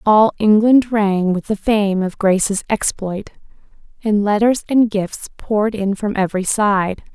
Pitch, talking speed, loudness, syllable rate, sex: 205 Hz, 150 wpm, -17 LUFS, 4.2 syllables/s, female